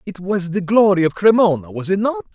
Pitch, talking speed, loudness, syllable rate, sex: 185 Hz, 230 wpm, -17 LUFS, 5.6 syllables/s, male